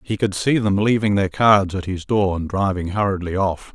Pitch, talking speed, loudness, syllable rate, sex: 100 Hz, 225 wpm, -19 LUFS, 4.9 syllables/s, male